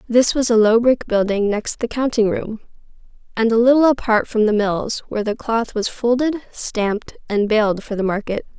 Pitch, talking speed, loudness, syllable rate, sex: 225 Hz, 195 wpm, -18 LUFS, 4.9 syllables/s, female